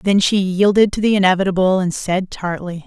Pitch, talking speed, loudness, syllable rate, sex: 190 Hz, 190 wpm, -16 LUFS, 5.3 syllables/s, female